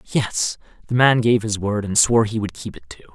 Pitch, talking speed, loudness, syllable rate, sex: 105 Hz, 250 wpm, -19 LUFS, 5.5 syllables/s, male